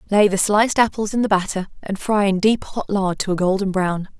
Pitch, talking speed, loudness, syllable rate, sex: 200 Hz, 245 wpm, -19 LUFS, 5.5 syllables/s, female